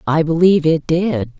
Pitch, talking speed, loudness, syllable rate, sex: 160 Hz, 170 wpm, -15 LUFS, 5.0 syllables/s, female